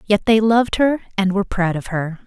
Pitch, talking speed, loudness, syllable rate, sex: 205 Hz, 240 wpm, -18 LUFS, 5.6 syllables/s, female